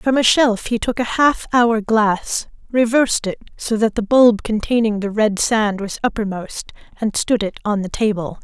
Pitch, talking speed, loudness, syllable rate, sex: 220 Hz, 190 wpm, -18 LUFS, 4.5 syllables/s, female